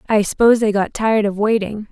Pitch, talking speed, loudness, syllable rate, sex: 210 Hz, 220 wpm, -16 LUFS, 5.8 syllables/s, female